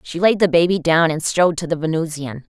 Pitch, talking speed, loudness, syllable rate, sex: 165 Hz, 235 wpm, -17 LUFS, 5.9 syllables/s, female